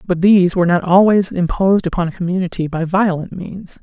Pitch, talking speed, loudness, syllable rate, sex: 180 Hz, 190 wpm, -15 LUFS, 6.0 syllables/s, female